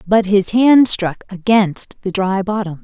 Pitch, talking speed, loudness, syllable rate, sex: 200 Hz, 170 wpm, -15 LUFS, 3.8 syllables/s, female